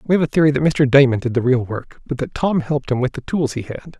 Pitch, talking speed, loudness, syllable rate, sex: 135 Hz, 315 wpm, -18 LUFS, 6.3 syllables/s, male